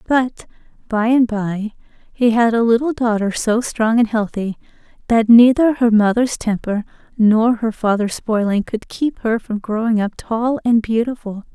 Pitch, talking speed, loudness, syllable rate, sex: 225 Hz, 160 wpm, -17 LUFS, 4.3 syllables/s, female